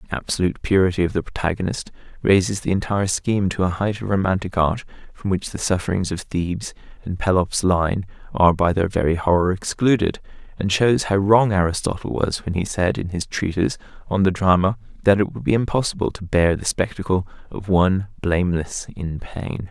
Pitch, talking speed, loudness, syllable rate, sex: 95 Hz, 185 wpm, -21 LUFS, 5.7 syllables/s, male